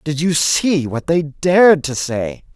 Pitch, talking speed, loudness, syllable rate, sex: 155 Hz, 190 wpm, -16 LUFS, 3.8 syllables/s, male